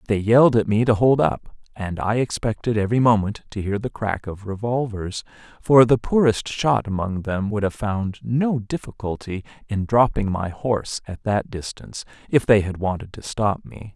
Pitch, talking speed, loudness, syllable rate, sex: 110 Hz, 185 wpm, -21 LUFS, 4.8 syllables/s, male